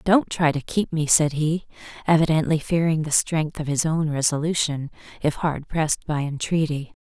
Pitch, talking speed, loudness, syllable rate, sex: 155 Hz, 170 wpm, -22 LUFS, 5.0 syllables/s, female